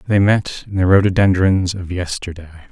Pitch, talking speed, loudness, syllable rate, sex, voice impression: 95 Hz, 155 wpm, -16 LUFS, 5.2 syllables/s, male, masculine, adult-like, relaxed, weak, slightly dark, soft, cool, calm, friendly, reassuring, kind, modest